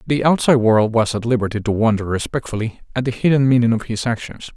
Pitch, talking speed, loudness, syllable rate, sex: 115 Hz, 210 wpm, -18 LUFS, 6.3 syllables/s, male